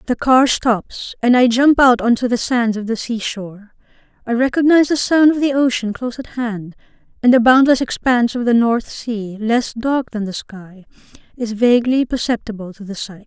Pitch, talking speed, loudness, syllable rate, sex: 235 Hz, 195 wpm, -16 LUFS, 5.1 syllables/s, female